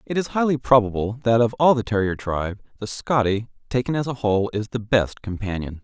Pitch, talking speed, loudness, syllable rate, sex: 115 Hz, 205 wpm, -22 LUFS, 5.7 syllables/s, male